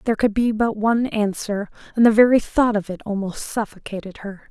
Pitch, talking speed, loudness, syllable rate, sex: 215 Hz, 200 wpm, -20 LUFS, 5.6 syllables/s, female